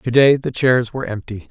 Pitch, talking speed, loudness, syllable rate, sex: 125 Hz, 200 wpm, -17 LUFS, 5.4 syllables/s, male